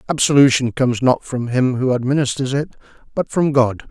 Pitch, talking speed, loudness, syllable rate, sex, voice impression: 130 Hz, 170 wpm, -17 LUFS, 5.4 syllables/s, male, masculine, slightly old, slightly thick, slightly tensed, powerful, slightly muffled, raspy, mature, wild, lively, strict, intense